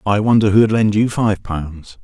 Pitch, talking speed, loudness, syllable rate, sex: 105 Hz, 205 wpm, -15 LUFS, 4.2 syllables/s, male